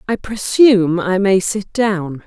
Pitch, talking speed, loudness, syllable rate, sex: 195 Hz, 160 wpm, -15 LUFS, 3.8 syllables/s, female